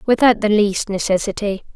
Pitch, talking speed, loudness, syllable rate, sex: 210 Hz, 135 wpm, -17 LUFS, 5.2 syllables/s, female